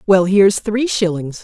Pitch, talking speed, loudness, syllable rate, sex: 195 Hz, 165 wpm, -15 LUFS, 4.7 syllables/s, female